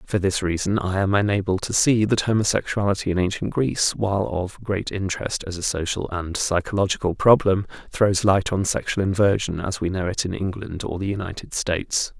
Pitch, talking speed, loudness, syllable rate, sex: 95 Hz, 175 wpm, -22 LUFS, 5.5 syllables/s, male